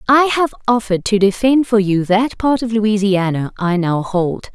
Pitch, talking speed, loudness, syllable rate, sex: 210 Hz, 185 wpm, -16 LUFS, 4.5 syllables/s, female